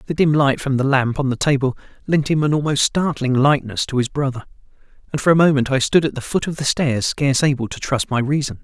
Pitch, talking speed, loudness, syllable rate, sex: 140 Hz, 250 wpm, -18 LUFS, 6.1 syllables/s, male